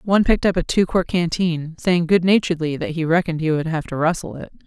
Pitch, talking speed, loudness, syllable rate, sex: 165 Hz, 245 wpm, -19 LUFS, 6.3 syllables/s, female